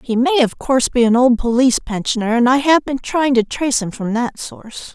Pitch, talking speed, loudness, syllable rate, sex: 245 Hz, 245 wpm, -16 LUFS, 5.6 syllables/s, female